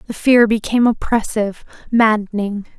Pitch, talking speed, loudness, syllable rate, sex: 220 Hz, 110 wpm, -16 LUFS, 5.3 syllables/s, female